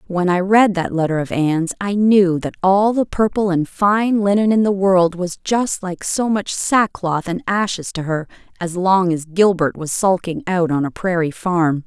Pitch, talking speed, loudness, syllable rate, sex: 185 Hz, 200 wpm, -17 LUFS, 4.4 syllables/s, female